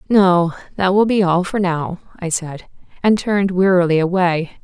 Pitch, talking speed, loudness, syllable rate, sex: 185 Hz, 170 wpm, -17 LUFS, 4.7 syllables/s, female